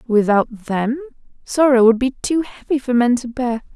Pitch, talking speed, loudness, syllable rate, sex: 250 Hz, 175 wpm, -18 LUFS, 4.7 syllables/s, female